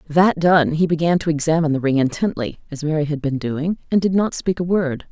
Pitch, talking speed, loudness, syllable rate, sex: 160 Hz, 235 wpm, -19 LUFS, 5.7 syllables/s, female